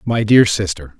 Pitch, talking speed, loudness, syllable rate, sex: 105 Hz, 180 wpm, -15 LUFS, 4.5 syllables/s, male